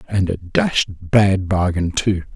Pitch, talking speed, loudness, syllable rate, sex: 95 Hz, 155 wpm, -18 LUFS, 3.5 syllables/s, male